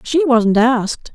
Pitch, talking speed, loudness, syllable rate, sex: 245 Hz, 155 wpm, -15 LUFS, 3.8 syllables/s, female